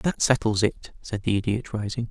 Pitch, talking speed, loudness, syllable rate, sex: 110 Hz, 200 wpm, -25 LUFS, 5.0 syllables/s, male